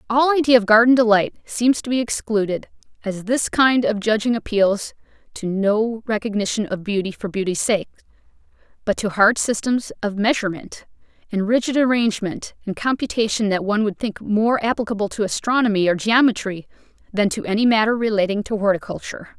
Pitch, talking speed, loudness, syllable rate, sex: 220 Hz, 160 wpm, -20 LUFS, 5.6 syllables/s, female